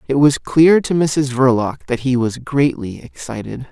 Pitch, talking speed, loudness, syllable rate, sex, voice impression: 135 Hz, 180 wpm, -16 LUFS, 4.3 syllables/s, male, masculine, slightly young, slightly adult-like, slightly tensed, slightly weak, slightly bright, hard, clear, slightly fluent, slightly cool, slightly intellectual, slightly refreshing, sincere, slightly calm, slightly friendly, slightly reassuring, unique, slightly wild, kind, very modest